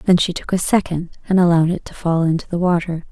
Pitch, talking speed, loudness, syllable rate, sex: 175 Hz, 250 wpm, -18 LUFS, 6.3 syllables/s, female